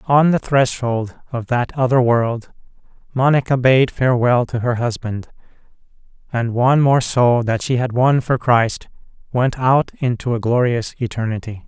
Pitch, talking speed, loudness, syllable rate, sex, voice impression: 125 Hz, 150 wpm, -17 LUFS, 4.5 syllables/s, male, very masculine, slightly adult-like, middle-aged, thick, tensed, slightly powerful, bright, hard, soft, slightly clear, slightly fluent, cool, very intellectual, slightly refreshing, sincere, calm, mature, friendly, reassuring, unique, elegant, wild, slightly sweet, lively, kind, very modest